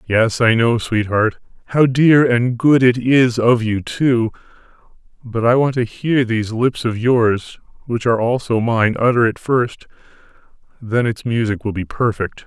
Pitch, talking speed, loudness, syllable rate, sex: 115 Hz, 160 wpm, -16 LUFS, 4.3 syllables/s, male